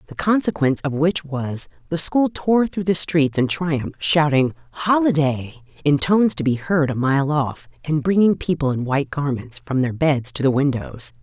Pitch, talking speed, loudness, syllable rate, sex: 150 Hz, 185 wpm, -20 LUFS, 4.7 syllables/s, female